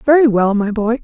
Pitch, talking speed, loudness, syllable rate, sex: 235 Hz, 235 wpm, -14 LUFS, 5.1 syllables/s, female